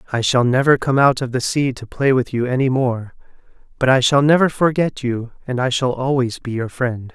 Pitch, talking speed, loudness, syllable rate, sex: 130 Hz, 225 wpm, -18 LUFS, 5.2 syllables/s, male